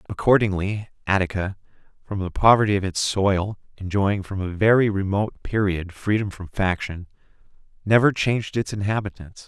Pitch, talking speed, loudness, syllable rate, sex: 100 Hz, 135 wpm, -22 LUFS, 5.2 syllables/s, male